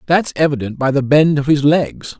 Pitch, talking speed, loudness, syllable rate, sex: 145 Hz, 220 wpm, -15 LUFS, 5.1 syllables/s, male